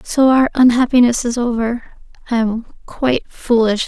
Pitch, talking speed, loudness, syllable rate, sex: 240 Hz, 140 wpm, -15 LUFS, 4.7 syllables/s, female